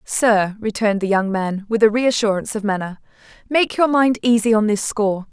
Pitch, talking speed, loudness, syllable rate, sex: 215 Hz, 190 wpm, -18 LUFS, 5.4 syllables/s, female